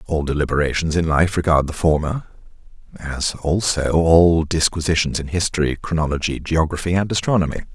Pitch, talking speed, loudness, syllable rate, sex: 80 Hz, 130 wpm, -19 LUFS, 5.5 syllables/s, male